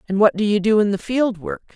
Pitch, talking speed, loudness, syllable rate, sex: 210 Hz, 305 wpm, -19 LUFS, 6.2 syllables/s, female